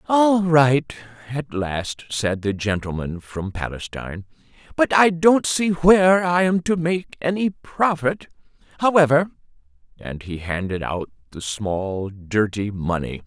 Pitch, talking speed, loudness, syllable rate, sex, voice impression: 135 Hz, 130 wpm, -21 LUFS, 4.0 syllables/s, male, masculine, very adult-like, slightly thick, cool, slightly intellectual, calm, slightly wild